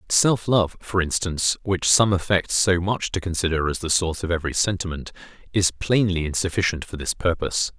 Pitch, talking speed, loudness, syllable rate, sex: 90 Hz, 175 wpm, -22 LUFS, 5.5 syllables/s, male